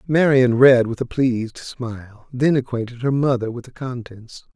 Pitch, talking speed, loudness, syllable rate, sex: 125 Hz, 170 wpm, -19 LUFS, 4.7 syllables/s, male